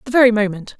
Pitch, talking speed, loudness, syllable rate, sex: 225 Hz, 230 wpm, -16 LUFS, 7.7 syllables/s, female